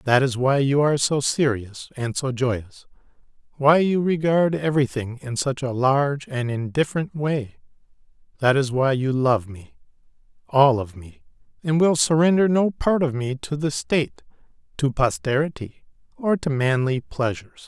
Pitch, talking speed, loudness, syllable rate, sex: 135 Hz, 155 wpm, -22 LUFS, 4.7 syllables/s, male